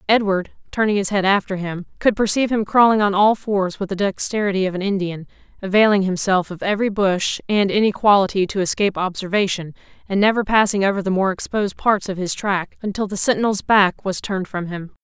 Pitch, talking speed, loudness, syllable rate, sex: 195 Hz, 190 wpm, -19 LUFS, 5.9 syllables/s, female